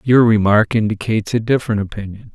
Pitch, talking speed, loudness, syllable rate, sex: 110 Hz, 155 wpm, -16 LUFS, 6.2 syllables/s, male